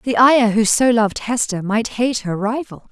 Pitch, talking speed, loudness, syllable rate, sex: 225 Hz, 205 wpm, -17 LUFS, 4.7 syllables/s, female